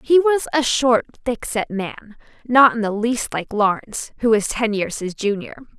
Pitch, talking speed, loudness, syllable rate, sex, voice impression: 230 Hz, 185 wpm, -19 LUFS, 4.6 syllables/s, female, feminine, slightly young, tensed, bright, clear, fluent, intellectual, slightly calm, friendly, reassuring, lively, kind